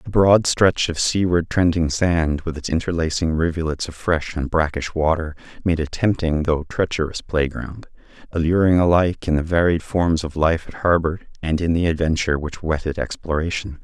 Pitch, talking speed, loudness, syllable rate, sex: 80 Hz, 170 wpm, -20 LUFS, 5.1 syllables/s, male